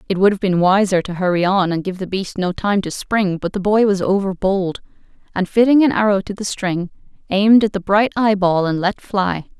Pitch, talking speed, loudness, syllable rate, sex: 195 Hz, 240 wpm, -17 LUFS, 5.2 syllables/s, female